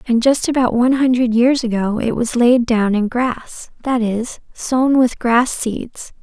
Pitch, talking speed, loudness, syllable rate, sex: 240 Hz, 185 wpm, -16 LUFS, 4.0 syllables/s, female